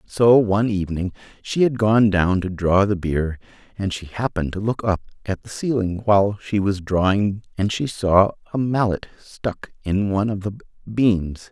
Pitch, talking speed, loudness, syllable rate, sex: 100 Hz, 180 wpm, -21 LUFS, 4.7 syllables/s, male